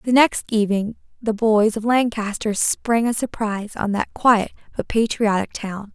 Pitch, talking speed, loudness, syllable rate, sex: 220 Hz, 160 wpm, -20 LUFS, 4.5 syllables/s, female